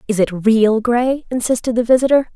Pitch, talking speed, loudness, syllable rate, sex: 235 Hz, 180 wpm, -16 LUFS, 5.3 syllables/s, female